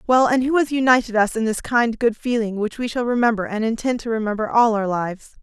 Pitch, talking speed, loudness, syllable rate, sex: 230 Hz, 245 wpm, -20 LUFS, 6.0 syllables/s, female